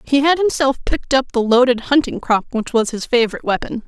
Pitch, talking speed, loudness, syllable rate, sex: 250 Hz, 215 wpm, -17 LUFS, 6.1 syllables/s, female